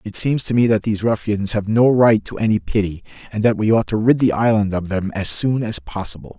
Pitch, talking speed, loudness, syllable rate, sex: 105 Hz, 255 wpm, -18 LUFS, 5.7 syllables/s, male